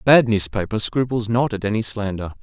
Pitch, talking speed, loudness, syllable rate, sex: 110 Hz, 200 wpm, -20 LUFS, 5.6 syllables/s, male